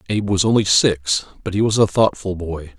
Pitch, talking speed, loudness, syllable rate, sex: 95 Hz, 215 wpm, -18 LUFS, 5.3 syllables/s, male